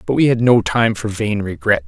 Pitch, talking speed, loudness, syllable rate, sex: 115 Hz, 255 wpm, -16 LUFS, 5.1 syllables/s, male